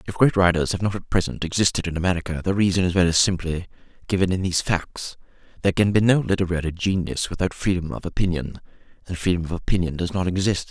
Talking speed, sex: 215 wpm, male